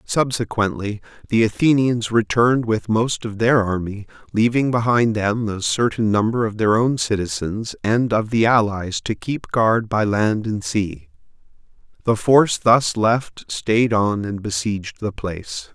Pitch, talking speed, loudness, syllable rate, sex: 110 Hz, 150 wpm, -19 LUFS, 4.2 syllables/s, male